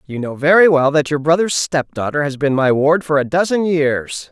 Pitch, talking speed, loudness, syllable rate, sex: 150 Hz, 225 wpm, -15 LUFS, 5.0 syllables/s, male